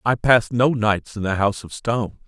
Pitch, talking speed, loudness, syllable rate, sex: 110 Hz, 240 wpm, -20 LUFS, 5.8 syllables/s, male